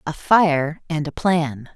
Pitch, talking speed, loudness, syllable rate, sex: 155 Hz, 170 wpm, -20 LUFS, 3.3 syllables/s, female